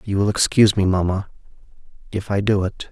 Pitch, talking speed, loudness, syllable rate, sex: 100 Hz, 185 wpm, -19 LUFS, 6.0 syllables/s, male